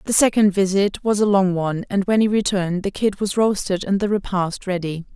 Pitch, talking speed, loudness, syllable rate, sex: 195 Hz, 220 wpm, -20 LUFS, 5.5 syllables/s, female